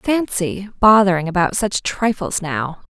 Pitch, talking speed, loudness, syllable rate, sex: 205 Hz, 125 wpm, -18 LUFS, 4.1 syllables/s, female